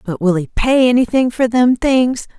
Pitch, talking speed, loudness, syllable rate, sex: 235 Hz, 200 wpm, -14 LUFS, 4.5 syllables/s, female